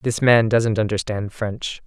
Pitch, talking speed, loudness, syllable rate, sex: 110 Hz, 160 wpm, -20 LUFS, 3.9 syllables/s, male